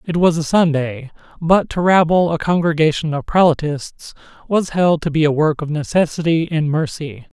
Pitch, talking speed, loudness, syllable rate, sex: 160 Hz, 170 wpm, -17 LUFS, 4.9 syllables/s, male